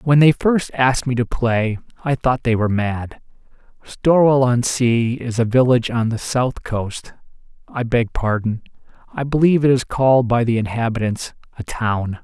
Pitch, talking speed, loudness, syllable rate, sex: 120 Hz, 165 wpm, -18 LUFS, 4.8 syllables/s, male